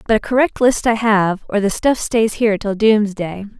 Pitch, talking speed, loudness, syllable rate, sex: 215 Hz, 215 wpm, -16 LUFS, 4.9 syllables/s, female